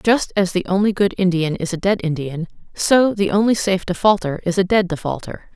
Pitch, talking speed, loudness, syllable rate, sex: 190 Hz, 205 wpm, -18 LUFS, 5.4 syllables/s, female